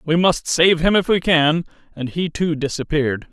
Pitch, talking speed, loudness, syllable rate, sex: 160 Hz, 200 wpm, -18 LUFS, 4.8 syllables/s, male